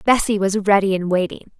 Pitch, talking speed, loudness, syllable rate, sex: 200 Hz, 190 wpm, -18 LUFS, 5.6 syllables/s, female